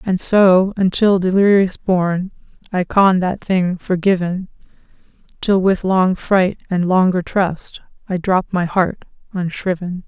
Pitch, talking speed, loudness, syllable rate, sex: 185 Hz, 130 wpm, -17 LUFS, 3.9 syllables/s, female